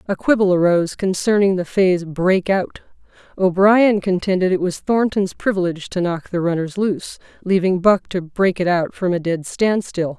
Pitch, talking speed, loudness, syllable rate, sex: 185 Hz, 170 wpm, -18 LUFS, 5.0 syllables/s, female